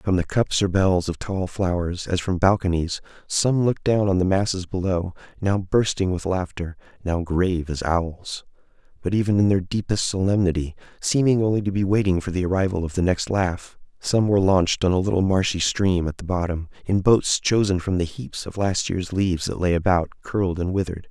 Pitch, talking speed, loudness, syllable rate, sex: 95 Hz, 200 wpm, -22 LUFS, 5.3 syllables/s, male